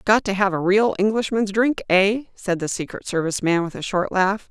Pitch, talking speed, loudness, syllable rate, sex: 200 Hz, 225 wpm, -21 LUFS, 5.2 syllables/s, female